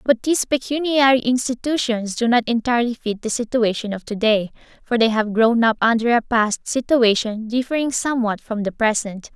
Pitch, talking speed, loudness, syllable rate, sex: 235 Hz, 165 wpm, -19 LUFS, 5.3 syllables/s, female